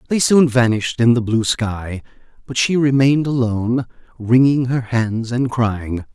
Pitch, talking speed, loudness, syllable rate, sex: 120 Hz, 155 wpm, -17 LUFS, 4.5 syllables/s, male